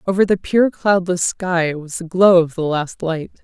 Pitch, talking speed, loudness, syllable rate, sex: 175 Hz, 210 wpm, -17 LUFS, 4.4 syllables/s, female